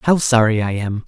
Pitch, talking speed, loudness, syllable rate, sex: 115 Hz, 225 wpm, -17 LUFS, 5.4 syllables/s, male